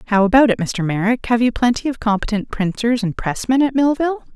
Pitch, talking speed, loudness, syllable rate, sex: 230 Hz, 205 wpm, -18 LUFS, 5.9 syllables/s, female